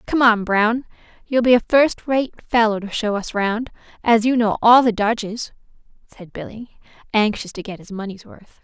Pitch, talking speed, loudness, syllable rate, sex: 220 Hz, 190 wpm, -18 LUFS, 4.7 syllables/s, female